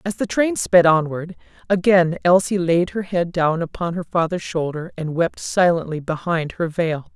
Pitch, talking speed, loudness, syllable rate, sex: 175 Hz, 175 wpm, -20 LUFS, 4.5 syllables/s, female